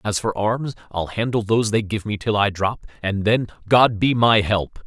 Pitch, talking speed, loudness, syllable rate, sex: 105 Hz, 220 wpm, -20 LUFS, 4.8 syllables/s, male